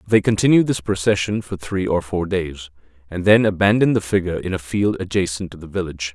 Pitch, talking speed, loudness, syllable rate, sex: 95 Hz, 205 wpm, -19 LUFS, 5.9 syllables/s, male